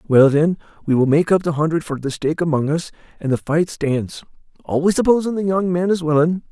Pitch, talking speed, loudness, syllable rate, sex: 160 Hz, 210 wpm, -18 LUFS, 5.8 syllables/s, male